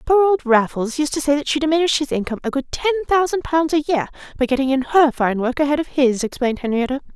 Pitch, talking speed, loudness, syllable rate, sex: 280 Hz, 245 wpm, -19 LUFS, 6.5 syllables/s, female